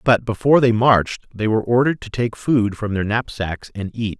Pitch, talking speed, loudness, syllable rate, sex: 110 Hz, 215 wpm, -19 LUFS, 5.5 syllables/s, male